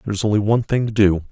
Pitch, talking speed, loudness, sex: 105 Hz, 320 wpm, -18 LUFS, male